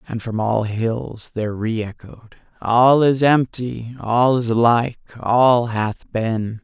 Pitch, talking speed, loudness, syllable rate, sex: 115 Hz, 145 wpm, -19 LUFS, 3.5 syllables/s, male